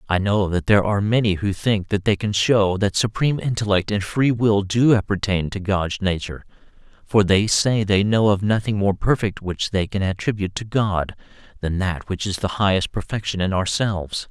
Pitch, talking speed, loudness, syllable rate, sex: 100 Hz, 195 wpm, -20 LUFS, 5.2 syllables/s, male